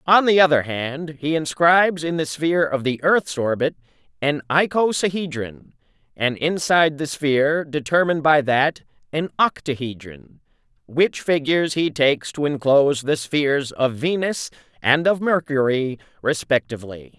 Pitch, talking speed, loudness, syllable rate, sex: 145 Hz, 135 wpm, -20 LUFS, 4.7 syllables/s, male